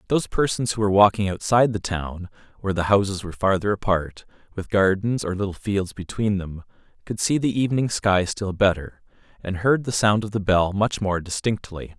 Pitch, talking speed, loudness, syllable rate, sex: 100 Hz, 190 wpm, -22 LUFS, 5.5 syllables/s, male